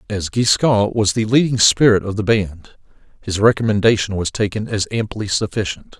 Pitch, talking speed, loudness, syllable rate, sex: 105 Hz, 160 wpm, -17 LUFS, 5.1 syllables/s, male